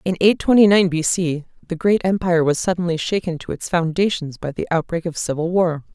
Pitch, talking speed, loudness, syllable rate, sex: 175 Hz, 210 wpm, -19 LUFS, 5.6 syllables/s, female